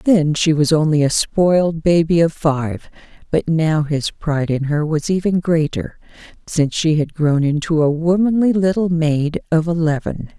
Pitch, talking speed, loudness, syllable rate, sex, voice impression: 160 Hz, 170 wpm, -17 LUFS, 4.5 syllables/s, female, feminine, adult-like, slightly muffled, intellectual, calm, elegant